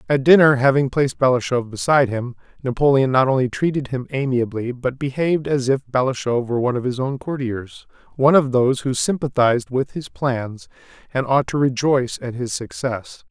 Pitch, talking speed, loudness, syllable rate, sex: 130 Hz, 175 wpm, -19 LUFS, 5.6 syllables/s, male